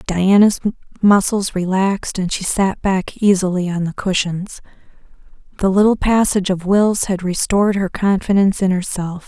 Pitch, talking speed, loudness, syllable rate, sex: 190 Hz, 140 wpm, -17 LUFS, 4.9 syllables/s, female